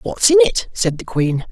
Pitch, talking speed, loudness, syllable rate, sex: 215 Hz, 240 wpm, -16 LUFS, 4.2 syllables/s, male